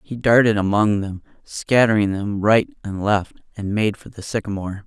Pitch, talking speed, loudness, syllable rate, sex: 105 Hz, 175 wpm, -19 LUFS, 4.8 syllables/s, male